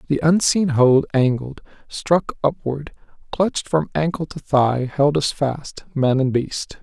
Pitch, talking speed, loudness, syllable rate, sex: 145 Hz, 140 wpm, -19 LUFS, 3.9 syllables/s, male